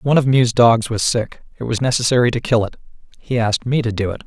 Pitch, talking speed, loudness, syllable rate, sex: 120 Hz, 255 wpm, -17 LUFS, 6.3 syllables/s, male